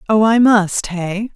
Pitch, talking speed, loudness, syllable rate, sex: 205 Hz, 175 wpm, -15 LUFS, 3.5 syllables/s, female